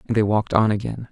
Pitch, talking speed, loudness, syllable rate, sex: 105 Hz, 270 wpm, -20 LUFS, 6.9 syllables/s, male